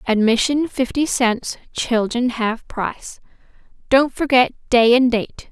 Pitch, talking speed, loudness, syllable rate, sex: 245 Hz, 120 wpm, -18 LUFS, 3.8 syllables/s, female